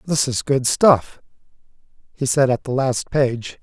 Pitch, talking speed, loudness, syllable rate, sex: 130 Hz, 165 wpm, -19 LUFS, 3.8 syllables/s, male